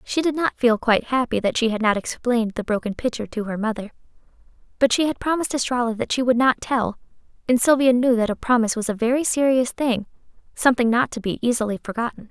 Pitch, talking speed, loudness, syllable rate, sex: 240 Hz, 215 wpm, -21 LUFS, 6.4 syllables/s, female